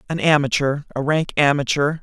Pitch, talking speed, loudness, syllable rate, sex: 145 Hz, 120 wpm, -19 LUFS, 5.1 syllables/s, male